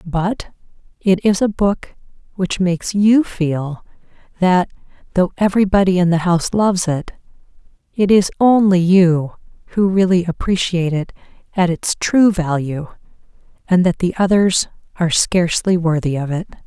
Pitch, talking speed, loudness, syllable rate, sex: 180 Hz, 135 wpm, -16 LUFS, 4.7 syllables/s, female